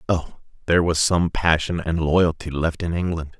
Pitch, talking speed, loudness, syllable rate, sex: 80 Hz, 175 wpm, -21 LUFS, 4.8 syllables/s, male